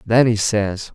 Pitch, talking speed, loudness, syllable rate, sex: 110 Hz, 190 wpm, -18 LUFS, 3.6 syllables/s, male